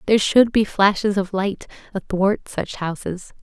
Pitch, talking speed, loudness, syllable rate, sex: 200 Hz, 160 wpm, -20 LUFS, 4.4 syllables/s, female